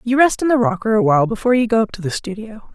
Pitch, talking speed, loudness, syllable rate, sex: 225 Hz, 285 wpm, -17 LUFS, 7.2 syllables/s, female